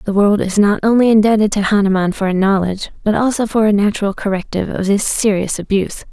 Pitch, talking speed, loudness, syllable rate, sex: 205 Hz, 205 wpm, -15 LUFS, 6.4 syllables/s, female